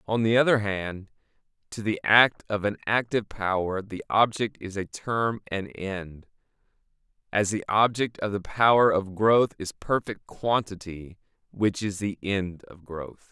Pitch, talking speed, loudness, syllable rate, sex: 100 Hz, 160 wpm, -25 LUFS, 4.2 syllables/s, male